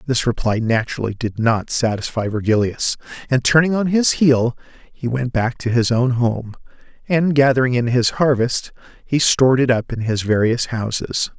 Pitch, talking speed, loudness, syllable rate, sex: 125 Hz, 170 wpm, -18 LUFS, 4.8 syllables/s, male